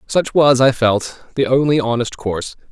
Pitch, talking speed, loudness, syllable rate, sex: 125 Hz, 175 wpm, -16 LUFS, 4.7 syllables/s, male